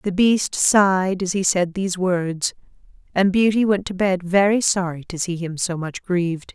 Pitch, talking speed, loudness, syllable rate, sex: 185 Hz, 195 wpm, -20 LUFS, 4.6 syllables/s, female